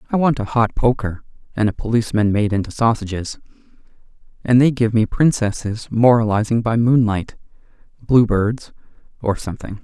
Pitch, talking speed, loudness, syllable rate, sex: 110 Hz, 140 wpm, -18 LUFS, 5.3 syllables/s, male